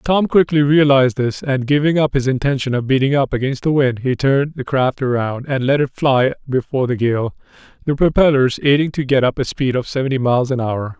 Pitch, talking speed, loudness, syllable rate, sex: 135 Hz, 220 wpm, -17 LUFS, 5.7 syllables/s, male